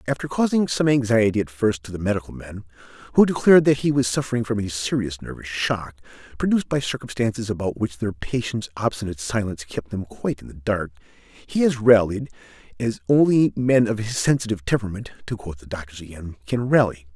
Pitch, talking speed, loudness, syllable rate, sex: 110 Hz, 185 wpm, -22 LUFS, 3.6 syllables/s, male